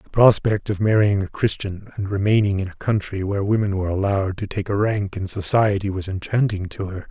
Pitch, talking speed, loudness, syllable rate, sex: 100 Hz, 210 wpm, -21 LUFS, 5.7 syllables/s, male